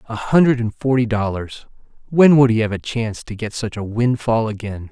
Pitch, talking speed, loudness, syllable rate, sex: 115 Hz, 205 wpm, -18 LUFS, 5.3 syllables/s, male